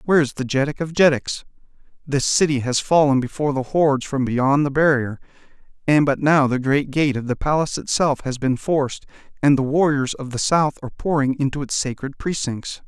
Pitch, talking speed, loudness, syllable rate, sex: 140 Hz, 195 wpm, -20 LUFS, 5.6 syllables/s, male